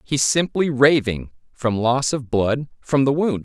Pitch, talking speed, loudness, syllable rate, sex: 135 Hz, 175 wpm, -20 LUFS, 4.0 syllables/s, male